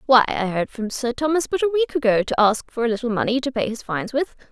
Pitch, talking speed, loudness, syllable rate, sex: 240 Hz, 280 wpm, -21 LUFS, 6.3 syllables/s, female